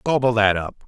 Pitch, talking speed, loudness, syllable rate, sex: 110 Hz, 205 wpm, -19 LUFS, 6.0 syllables/s, male